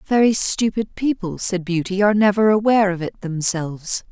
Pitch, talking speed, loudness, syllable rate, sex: 195 Hz, 160 wpm, -19 LUFS, 5.3 syllables/s, female